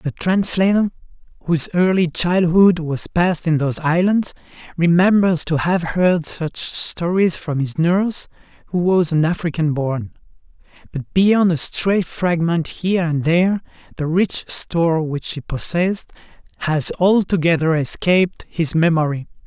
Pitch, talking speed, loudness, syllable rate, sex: 170 Hz, 135 wpm, -18 LUFS, 4.3 syllables/s, male